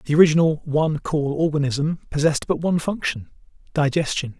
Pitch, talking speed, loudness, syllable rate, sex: 150 Hz, 125 wpm, -21 LUFS, 6.0 syllables/s, male